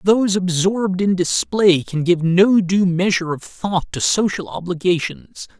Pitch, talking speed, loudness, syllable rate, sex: 175 Hz, 150 wpm, -18 LUFS, 4.5 syllables/s, male